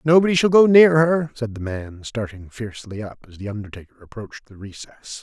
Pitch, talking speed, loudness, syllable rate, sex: 120 Hz, 195 wpm, -18 LUFS, 5.8 syllables/s, male